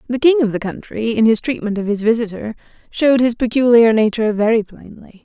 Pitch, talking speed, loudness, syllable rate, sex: 230 Hz, 195 wpm, -16 LUFS, 6.0 syllables/s, female